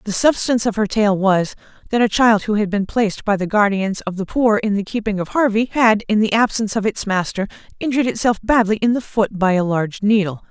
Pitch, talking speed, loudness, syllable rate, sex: 210 Hz, 235 wpm, -18 LUFS, 5.9 syllables/s, female